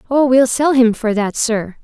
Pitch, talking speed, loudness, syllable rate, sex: 240 Hz, 230 wpm, -14 LUFS, 4.4 syllables/s, female